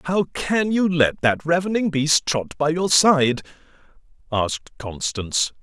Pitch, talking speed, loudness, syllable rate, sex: 155 Hz, 140 wpm, -20 LUFS, 4.1 syllables/s, male